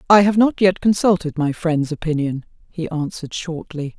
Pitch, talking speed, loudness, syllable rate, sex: 170 Hz, 165 wpm, -19 LUFS, 5.0 syllables/s, female